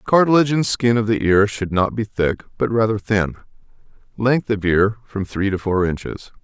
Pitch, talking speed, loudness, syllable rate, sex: 105 Hz, 205 wpm, -19 LUFS, 5.4 syllables/s, male